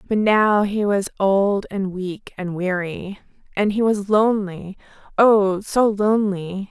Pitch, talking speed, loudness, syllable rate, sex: 200 Hz, 145 wpm, -20 LUFS, 3.7 syllables/s, female